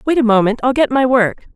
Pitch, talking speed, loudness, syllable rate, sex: 245 Hz, 270 wpm, -14 LUFS, 6.6 syllables/s, female